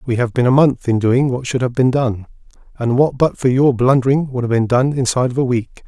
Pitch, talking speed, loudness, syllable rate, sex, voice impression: 125 Hz, 265 wpm, -16 LUFS, 5.7 syllables/s, male, very masculine, very adult-like, very middle-aged, very thick, slightly relaxed, powerful, dark, soft, slightly muffled, fluent, slightly raspy, very cool, intellectual, very sincere, very calm, very mature, very friendly, very reassuring, unique, elegant, very wild, sweet, slightly lively, very kind, modest